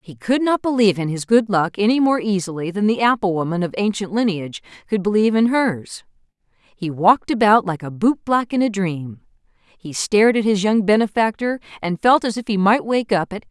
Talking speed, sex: 220 wpm, female